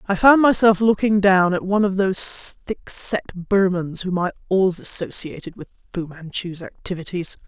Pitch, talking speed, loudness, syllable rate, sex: 190 Hz, 160 wpm, -19 LUFS, 5.1 syllables/s, female